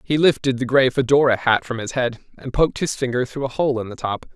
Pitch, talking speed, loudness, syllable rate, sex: 130 Hz, 260 wpm, -20 LUFS, 6.0 syllables/s, male